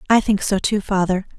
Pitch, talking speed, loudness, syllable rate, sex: 200 Hz, 215 wpm, -19 LUFS, 5.4 syllables/s, female